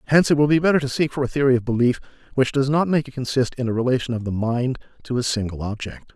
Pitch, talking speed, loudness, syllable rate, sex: 130 Hz, 275 wpm, -21 LUFS, 7.0 syllables/s, male